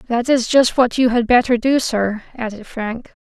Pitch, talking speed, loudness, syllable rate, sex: 235 Hz, 205 wpm, -17 LUFS, 4.4 syllables/s, female